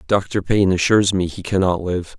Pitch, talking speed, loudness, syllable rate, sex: 95 Hz, 190 wpm, -18 LUFS, 5.5 syllables/s, male